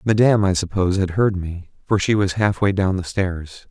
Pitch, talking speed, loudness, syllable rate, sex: 95 Hz, 210 wpm, -19 LUFS, 5.2 syllables/s, male